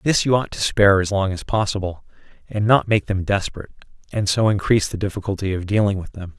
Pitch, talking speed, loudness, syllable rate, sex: 100 Hz, 215 wpm, -20 LUFS, 6.4 syllables/s, male